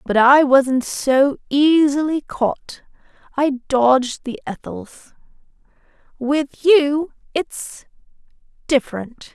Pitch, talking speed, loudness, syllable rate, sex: 275 Hz, 90 wpm, -18 LUFS, 3.1 syllables/s, female